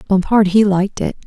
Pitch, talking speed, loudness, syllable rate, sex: 195 Hz, 190 wpm, -15 LUFS, 5.9 syllables/s, female